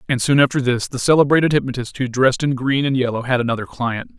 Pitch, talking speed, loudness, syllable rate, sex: 130 Hz, 230 wpm, -18 LUFS, 6.8 syllables/s, male